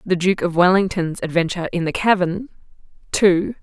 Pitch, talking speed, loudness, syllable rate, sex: 180 Hz, 150 wpm, -19 LUFS, 5.2 syllables/s, female